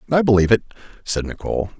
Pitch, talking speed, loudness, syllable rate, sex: 110 Hz, 165 wpm, -19 LUFS, 7.2 syllables/s, male